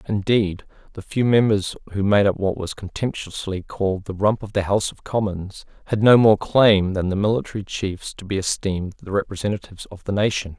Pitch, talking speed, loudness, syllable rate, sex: 100 Hz, 195 wpm, -21 LUFS, 5.5 syllables/s, male